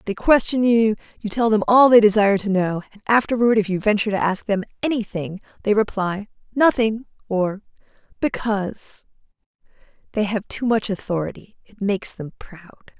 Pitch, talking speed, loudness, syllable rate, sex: 210 Hz, 155 wpm, -20 LUFS, 5.4 syllables/s, female